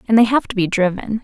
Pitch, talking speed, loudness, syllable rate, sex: 210 Hz, 290 wpm, -17 LUFS, 6.5 syllables/s, female